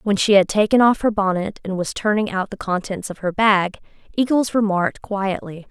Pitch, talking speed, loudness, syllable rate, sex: 200 Hz, 200 wpm, -19 LUFS, 5.2 syllables/s, female